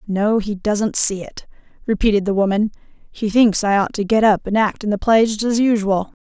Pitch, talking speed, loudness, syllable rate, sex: 210 Hz, 220 wpm, -18 LUFS, 5.0 syllables/s, female